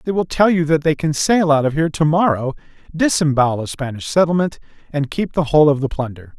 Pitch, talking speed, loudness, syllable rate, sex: 155 Hz, 225 wpm, -17 LUFS, 6.1 syllables/s, male